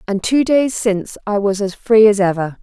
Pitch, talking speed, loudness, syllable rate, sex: 210 Hz, 230 wpm, -15 LUFS, 5.0 syllables/s, female